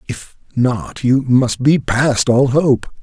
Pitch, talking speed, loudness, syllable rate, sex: 130 Hz, 160 wpm, -15 LUFS, 3.1 syllables/s, male